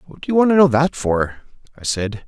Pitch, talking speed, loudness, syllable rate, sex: 135 Hz, 265 wpm, -18 LUFS, 5.6 syllables/s, male